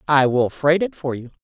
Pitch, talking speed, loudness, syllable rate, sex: 150 Hz, 250 wpm, -19 LUFS, 5.1 syllables/s, female